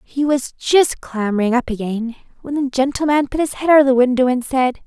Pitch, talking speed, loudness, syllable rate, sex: 260 Hz, 220 wpm, -17 LUFS, 5.5 syllables/s, female